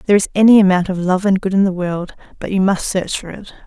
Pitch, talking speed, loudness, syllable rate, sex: 190 Hz, 280 wpm, -15 LUFS, 6.4 syllables/s, female